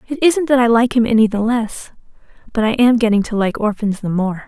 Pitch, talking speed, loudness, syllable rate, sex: 230 Hz, 240 wpm, -16 LUFS, 5.7 syllables/s, female